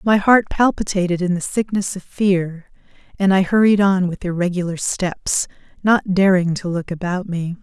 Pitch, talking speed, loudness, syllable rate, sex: 185 Hz, 165 wpm, -18 LUFS, 4.7 syllables/s, female